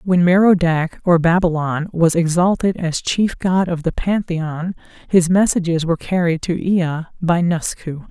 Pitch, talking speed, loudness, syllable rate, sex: 170 Hz, 150 wpm, -17 LUFS, 4.5 syllables/s, female